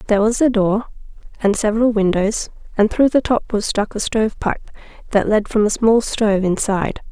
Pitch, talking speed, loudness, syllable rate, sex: 215 Hz, 185 wpm, -18 LUFS, 5.6 syllables/s, female